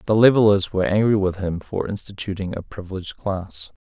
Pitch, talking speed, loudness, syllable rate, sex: 95 Hz, 175 wpm, -21 LUFS, 5.8 syllables/s, male